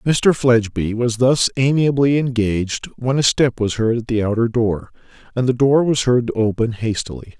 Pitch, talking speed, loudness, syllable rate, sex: 120 Hz, 185 wpm, -18 LUFS, 5.0 syllables/s, male